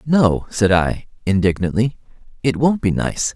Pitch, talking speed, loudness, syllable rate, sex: 110 Hz, 145 wpm, -18 LUFS, 4.3 syllables/s, male